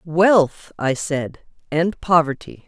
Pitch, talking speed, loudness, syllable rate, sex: 160 Hz, 110 wpm, -19 LUFS, 3.1 syllables/s, female